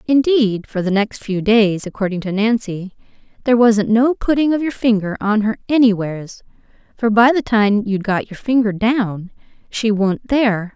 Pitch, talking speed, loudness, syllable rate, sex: 220 Hz, 175 wpm, -17 LUFS, 4.8 syllables/s, female